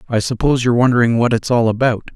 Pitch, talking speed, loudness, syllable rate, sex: 115 Hz, 225 wpm, -15 LUFS, 7.5 syllables/s, male